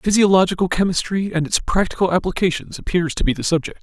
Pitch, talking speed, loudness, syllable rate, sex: 180 Hz, 175 wpm, -19 LUFS, 6.3 syllables/s, male